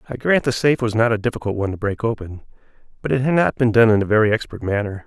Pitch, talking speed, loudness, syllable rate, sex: 115 Hz, 275 wpm, -19 LUFS, 7.2 syllables/s, male